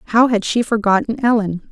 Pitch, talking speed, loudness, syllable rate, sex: 220 Hz, 175 wpm, -16 LUFS, 4.8 syllables/s, female